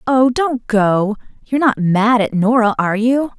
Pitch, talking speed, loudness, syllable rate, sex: 230 Hz, 175 wpm, -15 LUFS, 4.5 syllables/s, female